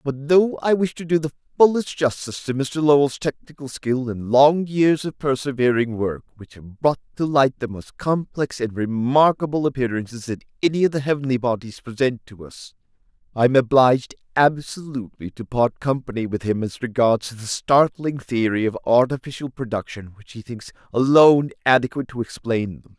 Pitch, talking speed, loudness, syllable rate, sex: 130 Hz, 170 wpm, -20 LUFS, 5.2 syllables/s, male